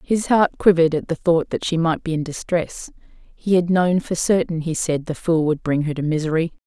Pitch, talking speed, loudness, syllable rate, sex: 165 Hz, 235 wpm, -20 LUFS, 5.3 syllables/s, female